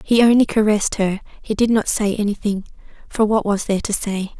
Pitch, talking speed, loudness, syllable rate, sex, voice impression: 210 Hz, 205 wpm, -18 LUFS, 6.1 syllables/s, female, feminine, young, slightly relaxed, slightly bright, soft, fluent, raspy, slightly cute, refreshing, friendly, elegant, lively, kind, slightly modest